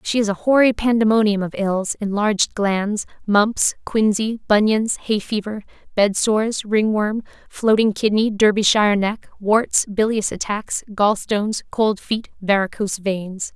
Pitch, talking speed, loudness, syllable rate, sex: 210 Hz, 120 wpm, -19 LUFS, 4.3 syllables/s, female